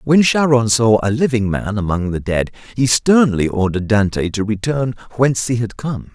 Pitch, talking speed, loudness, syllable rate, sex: 115 Hz, 185 wpm, -16 LUFS, 5.0 syllables/s, male